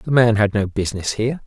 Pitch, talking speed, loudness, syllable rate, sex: 110 Hz, 245 wpm, -19 LUFS, 6.3 syllables/s, male